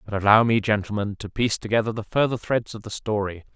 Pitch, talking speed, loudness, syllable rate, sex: 105 Hz, 220 wpm, -23 LUFS, 6.3 syllables/s, male